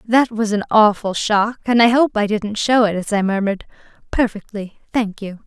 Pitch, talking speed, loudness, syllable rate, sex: 215 Hz, 200 wpm, -17 LUFS, 4.9 syllables/s, female